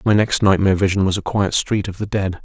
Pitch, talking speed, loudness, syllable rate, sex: 100 Hz, 270 wpm, -18 LUFS, 6.1 syllables/s, male